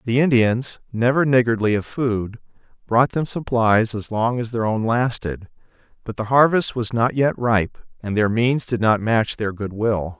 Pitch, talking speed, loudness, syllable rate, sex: 115 Hz, 185 wpm, -20 LUFS, 4.3 syllables/s, male